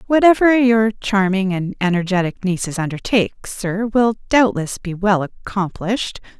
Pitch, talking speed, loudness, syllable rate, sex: 205 Hz, 120 wpm, -18 LUFS, 4.6 syllables/s, female